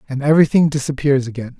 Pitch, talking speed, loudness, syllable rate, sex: 140 Hz, 150 wpm, -16 LUFS, 7.0 syllables/s, male